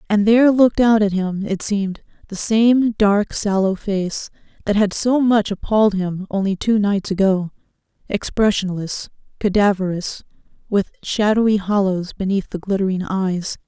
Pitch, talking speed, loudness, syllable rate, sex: 200 Hz, 135 wpm, -18 LUFS, 4.6 syllables/s, female